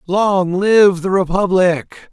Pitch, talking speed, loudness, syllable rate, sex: 185 Hz, 115 wpm, -14 LUFS, 3.1 syllables/s, male